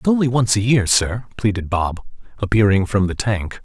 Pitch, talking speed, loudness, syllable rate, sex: 105 Hz, 200 wpm, -18 LUFS, 5.1 syllables/s, male